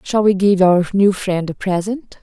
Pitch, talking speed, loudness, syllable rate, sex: 195 Hz, 215 wpm, -16 LUFS, 4.4 syllables/s, female